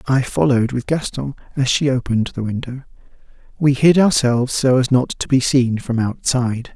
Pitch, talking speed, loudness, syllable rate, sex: 130 Hz, 180 wpm, -18 LUFS, 5.4 syllables/s, male